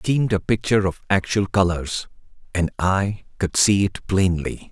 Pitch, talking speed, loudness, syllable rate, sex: 95 Hz, 165 wpm, -21 LUFS, 4.8 syllables/s, male